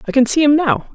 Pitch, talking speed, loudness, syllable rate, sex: 275 Hz, 320 wpm, -14 LUFS, 6.0 syllables/s, female